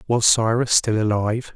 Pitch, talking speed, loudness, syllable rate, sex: 110 Hz, 155 wpm, -19 LUFS, 5.0 syllables/s, male